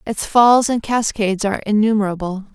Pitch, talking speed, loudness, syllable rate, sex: 210 Hz, 140 wpm, -17 LUFS, 5.5 syllables/s, female